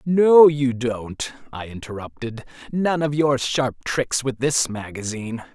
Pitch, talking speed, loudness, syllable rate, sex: 130 Hz, 140 wpm, -21 LUFS, 3.9 syllables/s, male